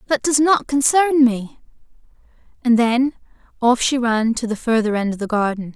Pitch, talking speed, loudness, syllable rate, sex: 245 Hz, 175 wpm, -18 LUFS, 5.0 syllables/s, female